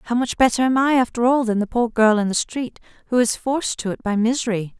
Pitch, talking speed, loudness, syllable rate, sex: 235 Hz, 265 wpm, -20 LUFS, 5.9 syllables/s, female